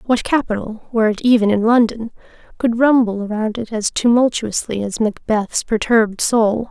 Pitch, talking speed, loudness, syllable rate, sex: 225 Hz, 150 wpm, -17 LUFS, 5.0 syllables/s, female